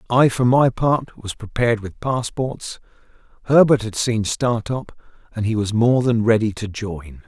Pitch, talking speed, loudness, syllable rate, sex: 115 Hz, 165 wpm, -19 LUFS, 4.3 syllables/s, male